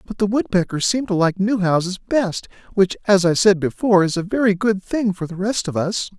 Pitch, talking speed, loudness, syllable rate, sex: 195 Hz, 235 wpm, -19 LUFS, 5.3 syllables/s, male